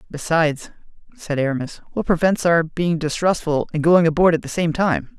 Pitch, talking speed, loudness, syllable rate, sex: 160 Hz, 175 wpm, -19 LUFS, 5.2 syllables/s, male